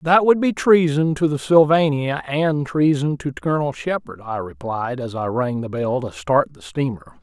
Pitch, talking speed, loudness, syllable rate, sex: 140 Hz, 190 wpm, -20 LUFS, 4.7 syllables/s, male